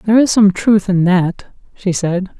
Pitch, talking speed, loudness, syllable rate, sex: 195 Hz, 200 wpm, -14 LUFS, 4.2 syllables/s, female